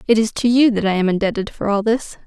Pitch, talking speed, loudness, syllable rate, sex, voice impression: 215 Hz, 290 wpm, -18 LUFS, 6.3 syllables/s, female, feminine, slightly young, slightly weak, soft, calm, kind, modest